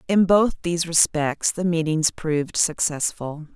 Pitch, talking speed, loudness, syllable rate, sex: 165 Hz, 135 wpm, -21 LUFS, 4.3 syllables/s, female